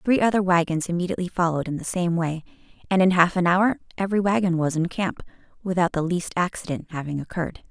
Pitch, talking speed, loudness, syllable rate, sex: 180 Hz, 195 wpm, -23 LUFS, 6.5 syllables/s, female